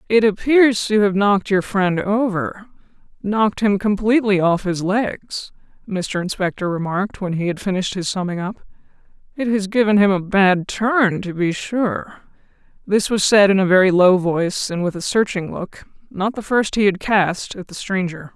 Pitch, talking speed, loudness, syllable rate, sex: 200 Hz, 180 wpm, -18 LUFS, 4.6 syllables/s, female